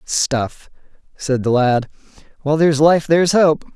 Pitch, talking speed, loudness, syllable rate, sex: 145 Hz, 145 wpm, -16 LUFS, 4.5 syllables/s, male